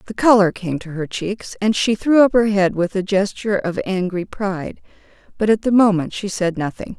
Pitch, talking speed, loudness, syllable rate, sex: 200 Hz, 215 wpm, -18 LUFS, 5.1 syllables/s, female